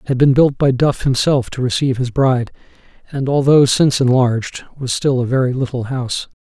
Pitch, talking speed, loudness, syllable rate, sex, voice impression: 130 Hz, 195 wpm, -16 LUFS, 5.8 syllables/s, male, masculine, middle-aged, relaxed, slightly weak, slightly muffled, raspy, intellectual, calm, slightly friendly, reassuring, slightly wild, kind, slightly modest